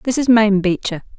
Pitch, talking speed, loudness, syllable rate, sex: 210 Hz, 200 wpm, -16 LUFS, 5.2 syllables/s, female